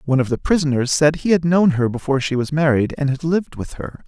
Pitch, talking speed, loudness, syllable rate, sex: 145 Hz, 265 wpm, -18 LUFS, 6.3 syllables/s, male